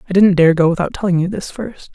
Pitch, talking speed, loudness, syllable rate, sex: 185 Hz, 280 wpm, -15 LUFS, 6.4 syllables/s, female